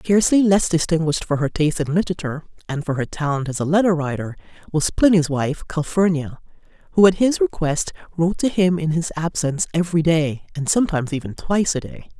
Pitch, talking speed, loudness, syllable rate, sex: 165 Hz, 185 wpm, -20 LUFS, 6.3 syllables/s, female